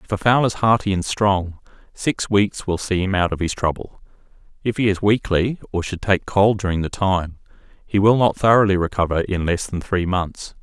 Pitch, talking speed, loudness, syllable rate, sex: 100 Hz, 210 wpm, -20 LUFS, 5.0 syllables/s, male